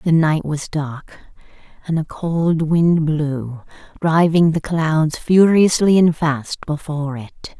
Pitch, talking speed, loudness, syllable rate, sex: 160 Hz, 135 wpm, -17 LUFS, 3.4 syllables/s, female